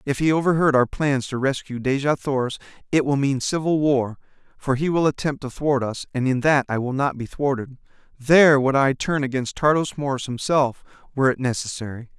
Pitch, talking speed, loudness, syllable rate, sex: 135 Hz, 195 wpm, -21 LUFS, 5.4 syllables/s, male